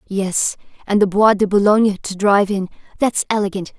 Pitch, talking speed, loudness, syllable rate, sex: 200 Hz, 175 wpm, -17 LUFS, 5.4 syllables/s, female